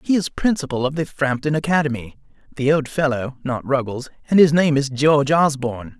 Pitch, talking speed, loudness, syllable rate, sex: 140 Hz, 160 wpm, -19 LUFS, 5.5 syllables/s, male